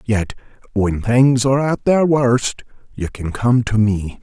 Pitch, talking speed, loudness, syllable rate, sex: 120 Hz, 170 wpm, -17 LUFS, 3.8 syllables/s, male